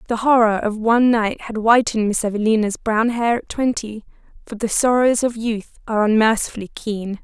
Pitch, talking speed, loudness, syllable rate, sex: 225 Hz, 175 wpm, -18 LUFS, 5.4 syllables/s, female